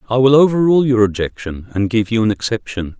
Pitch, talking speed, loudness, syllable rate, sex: 115 Hz, 200 wpm, -15 LUFS, 6.2 syllables/s, male